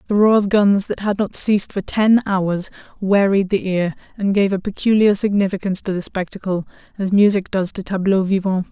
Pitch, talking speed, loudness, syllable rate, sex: 195 Hz, 195 wpm, -18 LUFS, 5.4 syllables/s, female